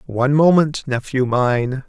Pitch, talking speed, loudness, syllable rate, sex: 135 Hz, 130 wpm, -17 LUFS, 4.1 syllables/s, male